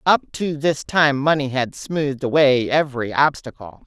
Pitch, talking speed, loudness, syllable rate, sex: 140 Hz, 155 wpm, -19 LUFS, 4.6 syllables/s, female